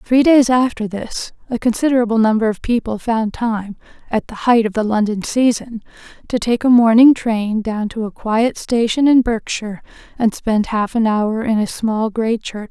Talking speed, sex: 215 wpm, female